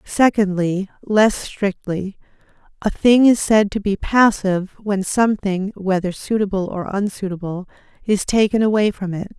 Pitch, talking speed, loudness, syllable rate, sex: 200 Hz, 135 wpm, -18 LUFS, 4.5 syllables/s, female